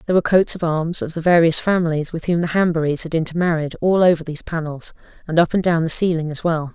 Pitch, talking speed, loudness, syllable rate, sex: 165 Hz, 240 wpm, -18 LUFS, 6.6 syllables/s, female